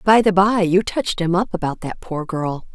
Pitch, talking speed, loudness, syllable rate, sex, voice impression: 185 Hz, 240 wpm, -19 LUFS, 5.1 syllables/s, female, very feminine, adult-like, slightly refreshing, friendly, kind